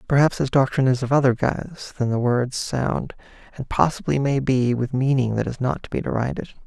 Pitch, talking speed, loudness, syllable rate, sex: 130 Hz, 205 wpm, -22 LUFS, 5.6 syllables/s, male